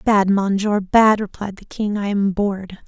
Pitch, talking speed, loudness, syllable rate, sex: 200 Hz, 190 wpm, -18 LUFS, 4.4 syllables/s, female